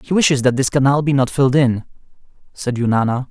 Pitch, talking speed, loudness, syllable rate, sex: 130 Hz, 200 wpm, -16 LUFS, 6.3 syllables/s, male